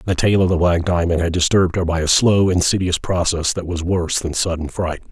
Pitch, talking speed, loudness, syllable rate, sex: 90 Hz, 235 wpm, -18 LUFS, 5.8 syllables/s, male